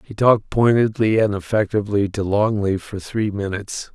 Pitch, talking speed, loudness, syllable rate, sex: 105 Hz, 150 wpm, -20 LUFS, 5.2 syllables/s, male